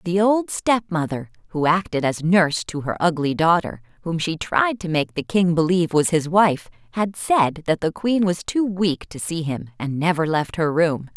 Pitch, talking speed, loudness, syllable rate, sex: 170 Hz, 205 wpm, -21 LUFS, 4.6 syllables/s, female